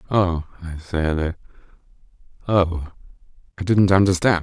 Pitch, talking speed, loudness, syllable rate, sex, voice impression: 90 Hz, 95 wpm, -20 LUFS, 4.1 syllables/s, male, masculine, middle-aged, tensed, powerful, hard, muffled, raspy, cool, intellectual, mature, wild, lively, strict